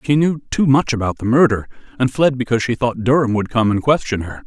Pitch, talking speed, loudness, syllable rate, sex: 125 Hz, 240 wpm, -17 LUFS, 6.1 syllables/s, male